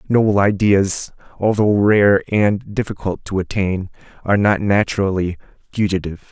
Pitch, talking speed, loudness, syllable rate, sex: 100 Hz, 115 wpm, -17 LUFS, 4.9 syllables/s, male